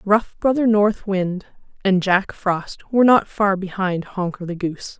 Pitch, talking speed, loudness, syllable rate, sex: 195 Hz, 170 wpm, -20 LUFS, 4.3 syllables/s, female